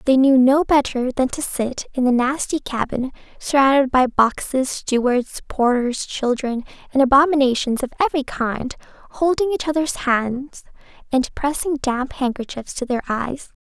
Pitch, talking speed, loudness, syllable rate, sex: 265 Hz, 145 wpm, -20 LUFS, 4.5 syllables/s, female